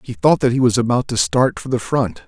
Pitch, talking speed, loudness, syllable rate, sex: 120 Hz, 290 wpm, -17 LUFS, 5.6 syllables/s, male